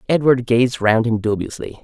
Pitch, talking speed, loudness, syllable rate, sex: 120 Hz, 165 wpm, -17 LUFS, 5.5 syllables/s, male